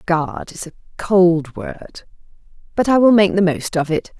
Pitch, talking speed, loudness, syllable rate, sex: 180 Hz, 185 wpm, -16 LUFS, 4.6 syllables/s, female